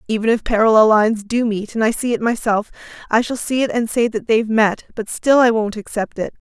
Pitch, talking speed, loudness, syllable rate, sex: 225 Hz, 240 wpm, -17 LUFS, 5.8 syllables/s, female